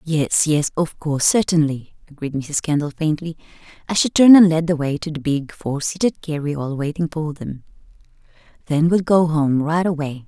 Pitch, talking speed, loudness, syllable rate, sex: 155 Hz, 180 wpm, -19 LUFS, 5.0 syllables/s, female